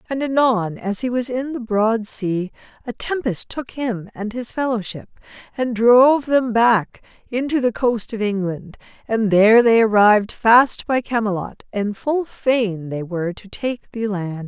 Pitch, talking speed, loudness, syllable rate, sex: 225 Hz, 170 wpm, -19 LUFS, 4.3 syllables/s, female